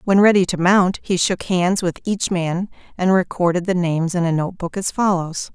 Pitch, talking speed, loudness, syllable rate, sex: 180 Hz, 215 wpm, -19 LUFS, 5.0 syllables/s, female